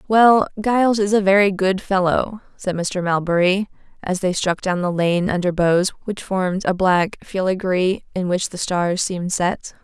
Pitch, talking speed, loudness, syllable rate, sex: 190 Hz, 175 wpm, -19 LUFS, 4.5 syllables/s, female